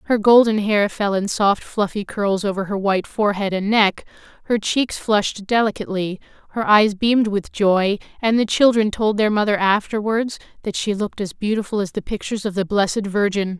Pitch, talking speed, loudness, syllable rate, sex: 205 Hz, 185 wpm, -19 LUFS, 5.3 syllables/s, female